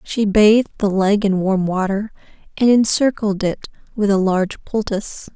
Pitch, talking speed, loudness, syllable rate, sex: 205 Hz, 155 wpm, -17 LUFS, 4.8 syllables/s, female